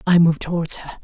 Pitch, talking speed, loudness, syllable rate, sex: 170 Hz, 235 wpm, -19 LUFS, 6.3 syllables/s, female